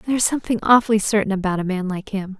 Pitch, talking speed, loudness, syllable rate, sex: 205 Hz, 250 wpm, -19 LUFS, 7.8 syllables/s, female